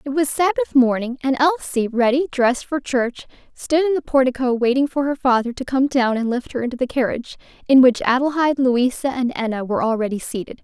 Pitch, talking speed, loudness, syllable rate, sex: 260 Hz, 205 wpm, -19 LUFS, 5.9 syllables/s, female